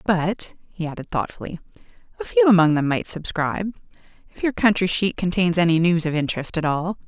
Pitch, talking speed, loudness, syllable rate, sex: 175 Hz, 180 wpm, -21 LUFS, 5.7 syllables/s, female